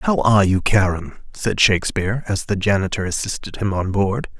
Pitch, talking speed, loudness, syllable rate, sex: 100 Hz, 180 wpm, -19 LUFS, 5.5 syllables/s, male